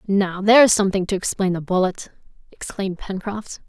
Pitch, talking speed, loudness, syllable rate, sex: 195 Hz, 145 wpm, -19 LUFS, 5.5 syllables/s, female